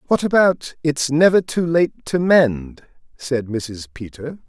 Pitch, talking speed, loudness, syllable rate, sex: 145 Hz, 145 wpm, -18 LUFS, 3.7 syllables/s, male